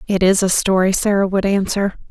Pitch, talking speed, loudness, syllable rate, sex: 195 Hz, 200 wpm, -16 LUFS, 5.5 syllables/s, female